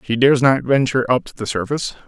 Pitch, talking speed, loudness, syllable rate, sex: 130 Hz, 230 wpm, -17 LUFS, 7.3 syllables/s, male